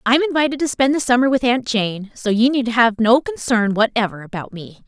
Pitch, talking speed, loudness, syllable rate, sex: 240 Hz, 235 wpm, -17 LUFS, 5.6 syllables/s, female